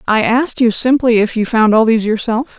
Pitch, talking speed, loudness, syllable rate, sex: 230 Hz, 230 wpm, -13 LUFS, 5.7 syllables/s, female